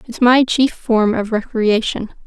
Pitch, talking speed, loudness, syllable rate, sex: 230 Hz, 160 wpm, -16 LUFS, 4.0 syllables/s, female